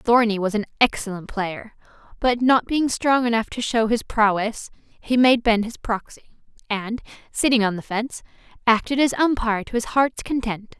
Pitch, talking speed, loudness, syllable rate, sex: 230 Hz, 170 wpm, -21 LUFS, 4.9 syllables/s, female